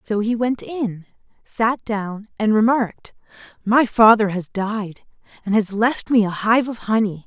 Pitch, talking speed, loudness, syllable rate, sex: 215 Hz, 165 wpm, -19 LUFS, 4.1 syllables/s, female